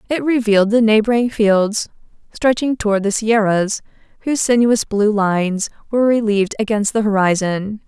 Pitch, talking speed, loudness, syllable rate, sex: 215 Hz, 135 wpm, -16 LUFS, 5.2 syllables/s, female